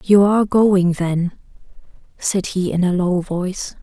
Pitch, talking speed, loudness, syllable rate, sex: 185 Hz, 155 wpm, -18 LUFS, 4.2 syllables/s, female